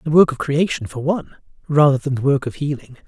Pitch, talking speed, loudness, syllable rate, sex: 145 Hz, 235 wpm, -19 LUFS, 6.2 syllables/s, male